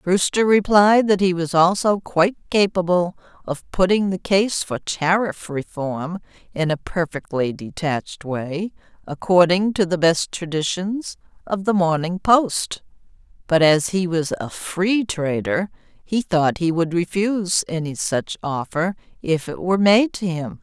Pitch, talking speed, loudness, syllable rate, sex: 180 Hz, 145 wpm, -20 LUFS, 4.1 syllables/s, female